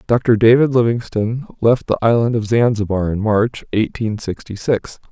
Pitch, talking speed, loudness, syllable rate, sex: 110 Hz, 155 wpm, -17 LUFS, 4.6 syllables/s, male